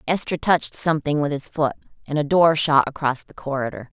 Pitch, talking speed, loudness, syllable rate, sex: 150 Hz, 195 wpm, -21 LUFS, 5.7 syllables/s, female